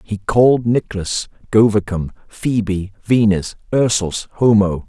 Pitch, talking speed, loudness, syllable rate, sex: 105 Hz, 100 wpm, -17 LUFS, 4.2 syllables/s, male